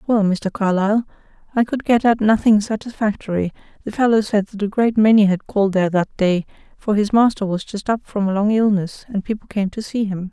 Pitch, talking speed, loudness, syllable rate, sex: 210 Hz, 215 wpm, -18 LUFS, 5.7 syllables/s, female